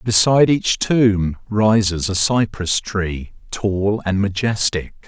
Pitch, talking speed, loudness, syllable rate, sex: 100 Hz, 120 wpm, -18 LUFS, 3.5 syllables/s, male